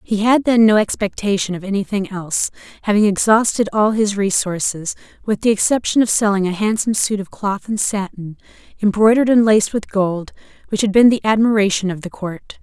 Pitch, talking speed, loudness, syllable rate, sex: 205 Hz, 180 wpm, -17 LUFS, 5.6 syllables/s, female